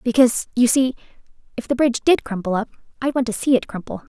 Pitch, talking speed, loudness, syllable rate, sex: 240 Hz, 215 wpm, -20 LUFS, 6.7 syllables/s, female